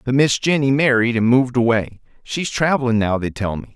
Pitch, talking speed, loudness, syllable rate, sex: 125 Hz, 190 wpm, -18 LUFS, 5.5 syllables/s, male